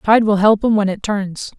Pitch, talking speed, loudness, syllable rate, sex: 205 Hz, 265 wpm, -16 LUFS, 4.9 syllables/s, female